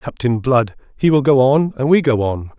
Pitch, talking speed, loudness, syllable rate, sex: 130 Hz, 230 wpm, -16 LUFS, 5.1 syllables/s, male